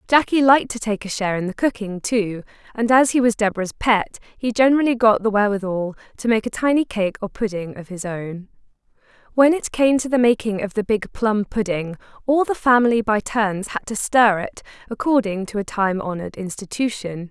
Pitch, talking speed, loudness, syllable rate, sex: 215 Hz, 200 wpm, -20 LUFS, 5.4 syllables/s, female